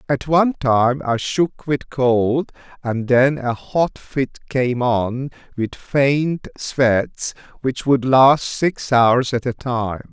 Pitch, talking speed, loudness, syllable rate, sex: 130 Hz, 150 wpm, -19 LUFS, 2.9 syllables/s, male